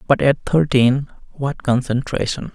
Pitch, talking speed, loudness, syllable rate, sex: 135 Hz, 95 wpm, -18 LUFS, 4.2 syllables/s, male